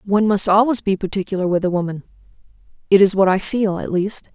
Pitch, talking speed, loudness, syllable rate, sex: 195 Hz, 205 wpm, -17 LUFS, 6.2 syllables/s, female